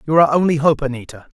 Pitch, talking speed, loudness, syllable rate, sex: 145 Hz, 215 wpm, -16 LUFS, 7.6 syllables/s, male